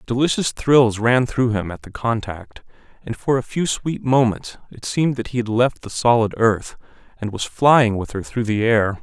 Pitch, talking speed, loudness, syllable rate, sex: 115 Hz, 205 wpm, -19 LUFS, 4.6 syllables/s, male